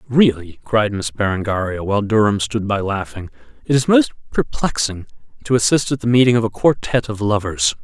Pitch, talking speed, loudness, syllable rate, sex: 110 Hz, 175 wpm, -18 LUFS, 5.6 syllables/s, male